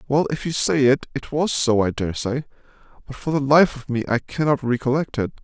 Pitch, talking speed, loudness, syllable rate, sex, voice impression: 135 Hz, 220 wpm, -21 LUFS, 5.5 syllables/s, male, masculine, adult-like, tensed, slightly powerful, hard, clear, cool, intellectual, calm, reassuring, wild, slightly modest